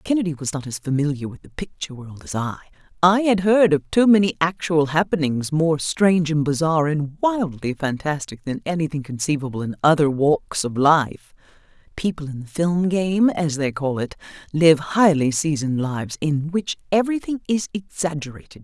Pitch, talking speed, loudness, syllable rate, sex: 155 Hz, 165 wpm, -21 LUFS, 5.2 syllables/s, female